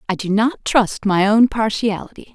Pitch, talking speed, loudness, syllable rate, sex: 215 Hz, 180 wpm, -17 LUFS, 4.6 syllables/s, female